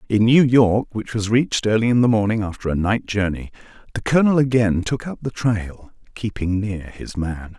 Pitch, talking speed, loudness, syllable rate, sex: 110 Hz, 200 wpm, -20 LUFS, 5.1 syllables/s, male